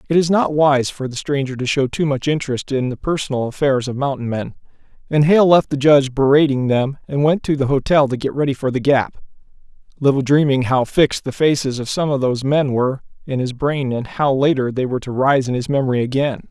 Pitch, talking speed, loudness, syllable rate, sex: 135 Hz, 230 wpm, -17 LUFS, 5.9 syllables/s, male